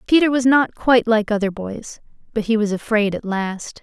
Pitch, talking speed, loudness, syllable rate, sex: 220 Hz, 205 wpm, -19 LUFS, 5.1 syllables/s, female